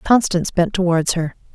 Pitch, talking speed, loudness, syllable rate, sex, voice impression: 175 Hz, 155 wpm, -18 LUFS, 5.5 syllables/s, female, feminine, adult-like, tensed, slightly powerful, hard, clear, fluent, slightly raspy, intellectual, calm, reassuring, elegant, slightly strict, modest